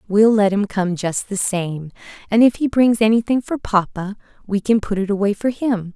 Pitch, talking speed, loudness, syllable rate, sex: 210 Hz, 210 wpm, -18 LUFS, 5.0 syllables/s, female